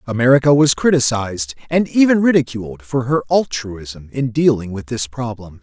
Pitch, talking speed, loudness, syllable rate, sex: 125 Hz, 150 wpm, -17 LUFS, 5.1 syllables/s, male